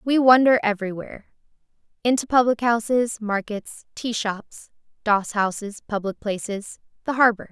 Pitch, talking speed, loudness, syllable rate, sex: 225 Hz, 120 wpm, -22 LUFS, 4.7 syllables/s, female